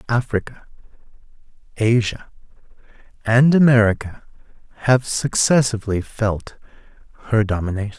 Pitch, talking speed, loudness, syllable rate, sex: 110 Hz, 70 wpm, -18 LUFS, 4.9 syllables/s, male